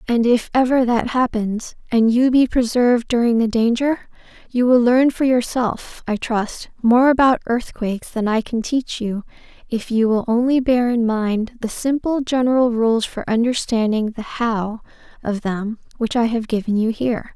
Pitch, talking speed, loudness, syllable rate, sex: 235 Hz, 175 wpm, -19 LUFS, 4.5 syllables/s, female